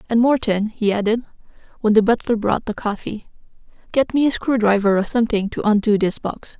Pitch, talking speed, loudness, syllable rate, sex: 220 Hz, 180 wpm, -19 LUFS, 5.5 syllables/s, female